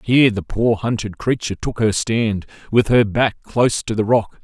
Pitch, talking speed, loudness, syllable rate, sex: 110 Hz, 205 wpm, -18 LUFS, 4.9 syllables/s, male